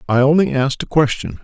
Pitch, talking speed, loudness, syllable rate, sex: 140 Hz, 210 wpm, -16 LUFS, 6.3 syllables/s, male